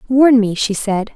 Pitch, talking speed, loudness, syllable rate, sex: 225 Hz, 210 wpm, -14 LUFS, 4.1 syllables/s, female